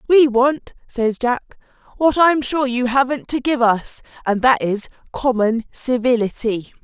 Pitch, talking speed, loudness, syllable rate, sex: 250 Hz, 140 wpm, -18 LUFS, 4.1 syllables/s, female